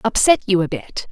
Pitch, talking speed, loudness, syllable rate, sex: 200 Hz, 215 wpm, -17 LUFS, 5.2 syllables/s, female